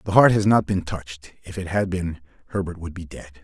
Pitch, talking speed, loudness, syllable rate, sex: 90 Hz, 245 wpm, -23 LUFS, 5.9 syllables/s, male